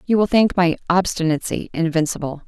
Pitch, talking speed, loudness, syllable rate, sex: 175 Hz, 145 wpm, -19 LUFS, 5.6 syllables/s, female